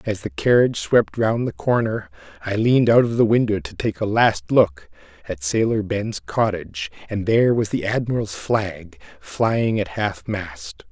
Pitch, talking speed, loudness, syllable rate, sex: 110 Hz, 175 wpm, -20 LUFS, 4.5 syllables/s, male